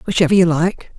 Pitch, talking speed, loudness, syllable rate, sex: 175 Hz, 185 wpm, -15 LUFS, 6.0 syllables/s, male